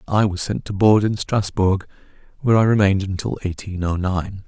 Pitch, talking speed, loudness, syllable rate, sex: 100 Hz, 190 wpm, -20 LUFS, 5.4 syllables/s, male